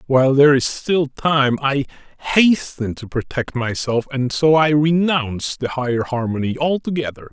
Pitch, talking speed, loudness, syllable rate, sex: 140 Hz, 150 wpm, -18 LUFS, 4.7 syllables/s, male